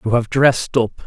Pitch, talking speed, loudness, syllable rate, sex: 120 Hz, 225 wpm, -17 LUFS, 6.0 syllables/s, male